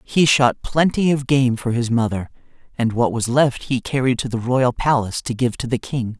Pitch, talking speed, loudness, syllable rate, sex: 125 Hz, 225 wpm, -19 LUFS, 5.0 syllables/s, male